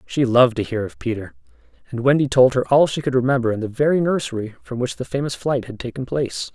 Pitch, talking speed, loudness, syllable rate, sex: 125 Hz, 240 wpm, -20 LUFS, 6.4 syllables/s, male